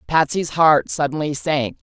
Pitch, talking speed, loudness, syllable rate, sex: 150 Hz, 125 wpm, -19 LUFS, 4.2 syllables/s, female